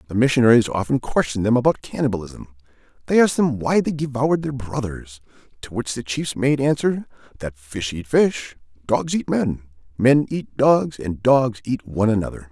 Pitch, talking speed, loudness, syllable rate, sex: 120 Hz, 175 wpm, -20 LUFS, 5.3 syllables/s, male